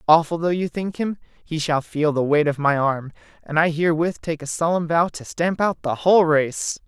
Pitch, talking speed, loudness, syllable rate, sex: 160 Hz, 225 wpm, -21 LUFS, 5.0 syllables/s, male